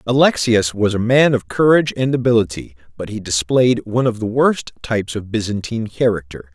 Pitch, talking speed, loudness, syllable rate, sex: 115 Hz, 175 wpm, -17 LUFS, 5.6 syllables/s, male